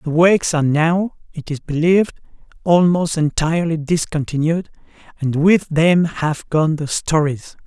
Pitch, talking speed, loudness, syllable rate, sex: 160 Hz, 135 wpm, -17 LUFS, 4.6 syllables/s, male